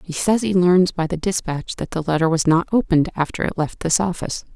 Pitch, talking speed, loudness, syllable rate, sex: 170 Hz, 235 wpm, -20 LUFS, 5.8 syllables/s, female